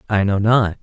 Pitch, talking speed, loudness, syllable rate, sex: 105 Hz, 220 wpm, -17 LUFS, 4.8 syllables/s, male